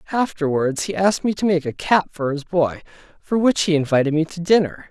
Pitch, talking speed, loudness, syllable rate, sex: 165 Hz, 220 wpm, -20 LUFS, 5.6 syllables/s, male